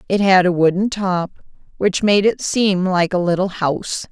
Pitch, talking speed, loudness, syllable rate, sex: 185 Hz, 190 wpm, -17 LUFS, 4.7 syllables/s, female